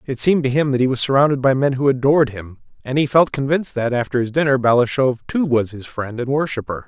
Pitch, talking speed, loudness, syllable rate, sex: 130 Hz, 245 wpm, -18 LUFS, 6.4 syllables/s, male